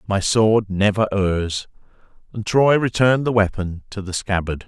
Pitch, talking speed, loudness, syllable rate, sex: 105 Hz, 155 wpm, -19 LUFS, 4.5 syllables/s, male